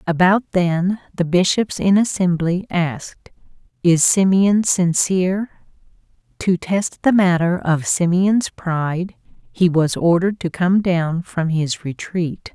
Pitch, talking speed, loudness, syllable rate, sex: 180 Hz, 125 wpm, -18 LUFS, 3.8 syllables/s, female